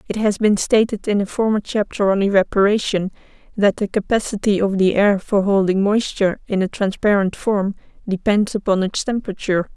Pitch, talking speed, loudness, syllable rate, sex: 200 Hz, 165 wpm, -18 LUFS, 5.5 syllables/s, female